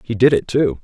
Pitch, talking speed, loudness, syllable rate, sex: 110 Hz, 285 wpm, -16 LUFS, 5.5 syllables/s, male